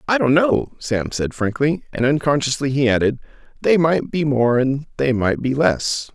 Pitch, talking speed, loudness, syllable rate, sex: 135 Hz, 185 wpm, -19 LUFS, 4.5 syllables/s, male